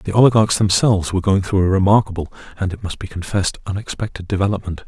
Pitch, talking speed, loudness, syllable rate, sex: 95 Hz, 185 wpm, -18 LUFS, 6.8 syllables/s, male